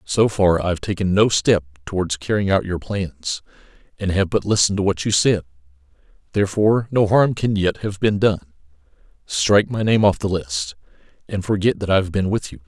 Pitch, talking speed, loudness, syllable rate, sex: 95 Hz, 200 wpm, -19 LUFS, 5.4 syllables/s, male